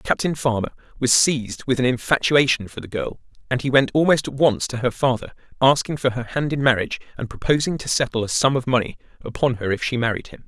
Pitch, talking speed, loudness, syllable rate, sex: 130 Hz, 225 wpm, -21 LUFS, 6.2 syllables/s, male